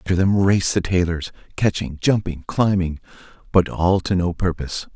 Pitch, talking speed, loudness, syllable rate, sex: 90 Hz, 155 wpm, -20 LUFS, 5.1 syllables/s, male